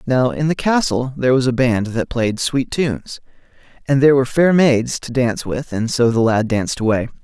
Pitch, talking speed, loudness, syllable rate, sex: 125 Hz, 215 wpm, -17 LUFS, 5.4 syllables/s, male